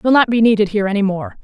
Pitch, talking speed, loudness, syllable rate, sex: 215 Hz, 295 wpm, -15 LUFS, 7.6 syllables/s, female